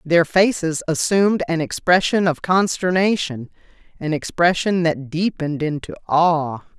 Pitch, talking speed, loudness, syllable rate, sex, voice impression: 165 Hz, 115 wpm, -19 LUFS, 4.4 syllables/s, female, feminine, middle-aged, calm, reassuring, slightly elegant